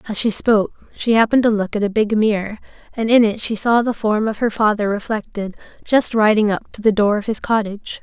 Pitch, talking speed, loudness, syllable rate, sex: 215 Hz, 230 wpm, -18 LUFS, 5.8 syllables/s, female